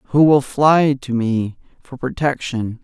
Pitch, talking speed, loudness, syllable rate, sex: 130 Hz, 150 wpm, -17 LUFS, 3.5 syllables/s, male